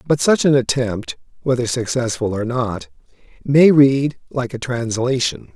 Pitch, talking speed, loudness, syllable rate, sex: 125 Hz, 140 wpm, -18 LUFS, 4.2 syllables/s, male